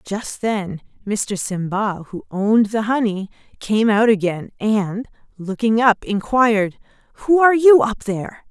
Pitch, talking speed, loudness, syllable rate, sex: 215 Hz, 140 wpm, -18 LUFS, 4.3 syllables/s, female